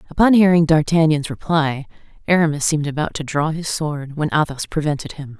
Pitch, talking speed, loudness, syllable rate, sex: 155 Hz, 165 wpm, -18 LUFS, 5.7 syllables/s, female